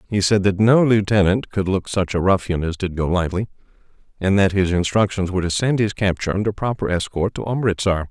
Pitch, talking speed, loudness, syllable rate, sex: 95 Hz, 200 wpm, -19 LUFS, 5.9 syllables/s, male